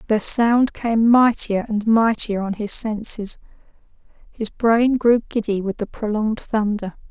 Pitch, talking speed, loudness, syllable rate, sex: 220 Hz, 145 wpm, -19 LUFS, 4.1 syllables/s, female